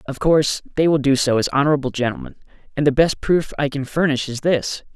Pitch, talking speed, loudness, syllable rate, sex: 145 Hz, 220 wpm, -19 LUFS, 6.2 syllables/s, male